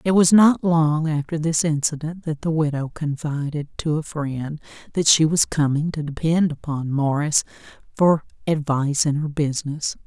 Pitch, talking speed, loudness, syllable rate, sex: 155 Hz, 160 wpm, -21 LUFS, 4.6 syllables/s, female